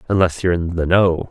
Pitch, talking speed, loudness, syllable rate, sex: 85 Hz, 230 wpm, -17 LUFS, 6.2 syllables/s, male